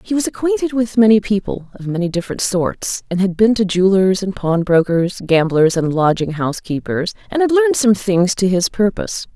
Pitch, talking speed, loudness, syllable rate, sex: 200 Hz, 195 wpm, -16 LUFS, 5.4 syllables/s, female